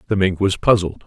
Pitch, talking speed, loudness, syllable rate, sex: 95 Hz, 225 wpm, -18 LUFS, 5.8 syllables/s, male